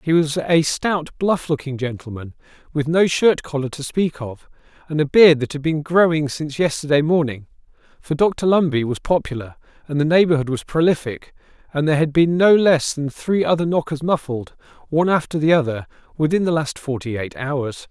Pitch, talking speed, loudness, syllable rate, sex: 150 Hz, 185 wpm, -19 LUFS, 5.3 syllables/s, male